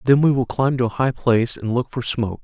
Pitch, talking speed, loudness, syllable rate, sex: 120 Hz, 295 wpm, -20 LUFS, 6.2 syllables/s, male